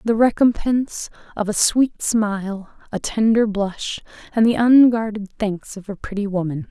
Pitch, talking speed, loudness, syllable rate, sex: 215 Hz, 150 wpm, -19 LUFS, 4.6 syllables/s, female